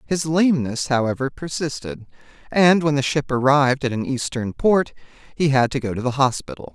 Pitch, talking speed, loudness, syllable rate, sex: 135 Hz, 180 wpm, -20 LUFS, 5.4 syllables/s, male